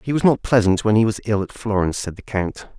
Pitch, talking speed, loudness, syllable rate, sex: 105 Hz, 280 wpm, -20 LUFS, 6.2 syllables/s, male